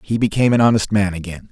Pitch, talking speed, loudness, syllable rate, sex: 105 Hz, 240 wpm, -16 LUFS, 7.1 syllables/s, male